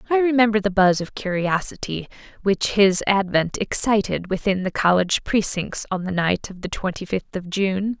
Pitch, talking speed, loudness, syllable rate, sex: 195 Hz, 175 wpm, -21 LUFS, 4.9 syllables/s, female